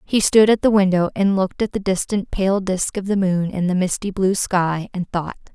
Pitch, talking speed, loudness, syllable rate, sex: 190 Hz, 240 wpm, -19 LUFS, 5.0 syllables/s, female